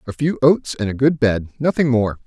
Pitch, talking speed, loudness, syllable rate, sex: 125 Hz, 210 wpm, -18 LUFS, 5.2 syllables/s, male